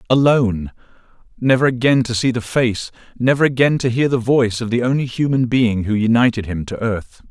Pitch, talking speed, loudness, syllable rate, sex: 120 Hz, 180 wpm, -17 LUFS, 5.6 syllables/s, male